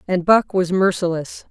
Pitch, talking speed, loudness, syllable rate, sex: 180 Hz, 160 wpm, -18 LUFS, 4.6 syllables/s, female